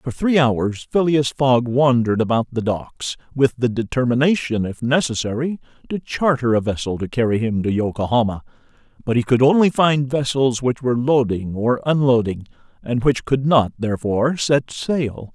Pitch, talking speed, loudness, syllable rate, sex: 125 Hz, 160 wpm, -19 LUFS, 4.9 syllables/s, male